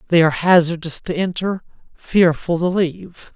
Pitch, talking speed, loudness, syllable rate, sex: 170 Hz, 145 wpm, -18 LUFS, 5.0 syllables/s, male